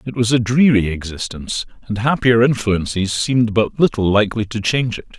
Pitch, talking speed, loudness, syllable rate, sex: 110 Hz, 175 wpm, -17 LUFS, 5.6 syllables/s, male